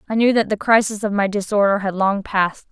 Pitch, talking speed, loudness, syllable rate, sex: 205 Hz, 245 wpm, -18 LUFS, 6.0 syllables/s, female